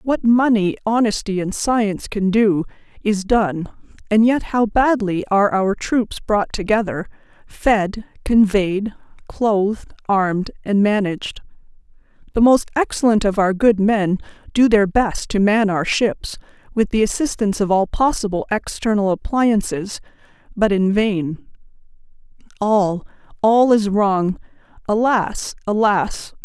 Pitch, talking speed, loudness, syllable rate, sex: 210 Hz, 125 wpm, -18 LUFS, 4.1 syllables/s, female